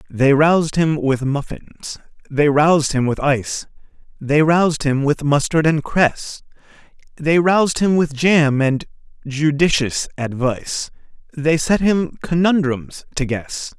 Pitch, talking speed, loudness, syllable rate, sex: 150 Hz, 130 wpm, -17 LUFS, 4.0 syllables/s, male